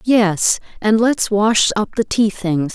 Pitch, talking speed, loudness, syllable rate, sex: 210 Hz, 175 wpm, -16 LUFS, 3.4 syllables/s, female